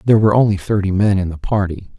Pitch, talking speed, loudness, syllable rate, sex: 100 Hz, 240 wpm, -16 LUFS, 7.2 syllables/s, male